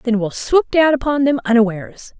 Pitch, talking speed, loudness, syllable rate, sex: 245 Hz, 190 wpm, -16 LUFS, 5.5 syllables/s, female